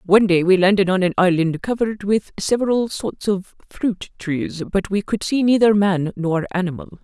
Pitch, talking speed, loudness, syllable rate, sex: 195 Hz, 190 wpm, -19 LUFS, 5.0 syllables/s, female